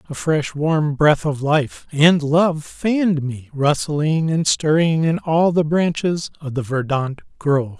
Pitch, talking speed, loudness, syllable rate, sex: 150 Hz, 160 wpm, -19 LUFS, 3.6 syllables/s, male